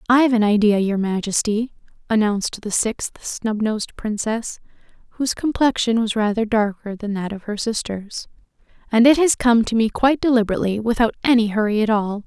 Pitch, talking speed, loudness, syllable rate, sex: 220 Hz, 160 wpm, -19 LUFS, 5.6 syllables/s, female